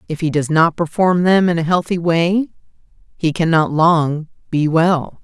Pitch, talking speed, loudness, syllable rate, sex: 165 Hz, 170 wpm, -16 LUFS, 4.4 syllables/s, female